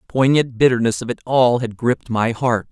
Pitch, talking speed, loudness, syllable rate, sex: 120 Hz, 220 wpm, -18 LUFS, 5.8 syllables/s, male